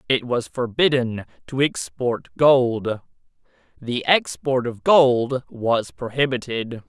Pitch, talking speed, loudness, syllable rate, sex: 120 Hz, 105 wpm, -21 LUFS, 2.2 syllables/s, male